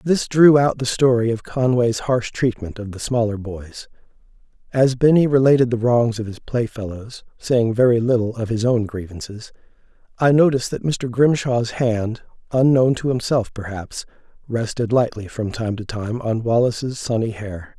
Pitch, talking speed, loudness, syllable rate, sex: 120 Hz, 160 wpm, -19 LUFS, 4.7 syllables/s, male